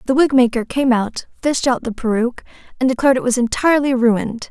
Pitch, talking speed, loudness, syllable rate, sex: 250 Hz, 200 wpm, -17 LUFS, 6.2 syllables/s, female